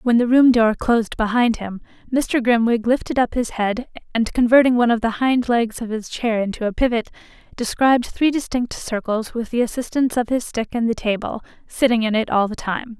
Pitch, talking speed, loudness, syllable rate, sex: 235 Hz, 210 wpm, -19 LUFS, 5.4 syllables/s, female